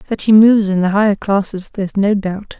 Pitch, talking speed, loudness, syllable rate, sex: 200 Hz, 230 wpm, -14 LUFS, 6.0 syllables/s, female